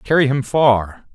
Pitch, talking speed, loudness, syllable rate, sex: 130 Hz, 160 wpm, -16 LUFS, 3.7 syllables/s, male